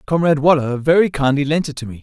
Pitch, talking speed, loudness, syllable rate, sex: 145 Hz, 235 wpm, -16 LUFS, 6.9 syllables/s, male